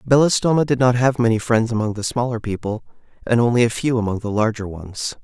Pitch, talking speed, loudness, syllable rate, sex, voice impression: 120 Hz, 205 wpm, -19 LUFS, 6.1 syllables/s, male, masculine, adult-like, tensed, powerful, slightly soft, clear, slightly nasal, cool, intellectual, calm, friendly, reassuring, slightly wild, lively, kind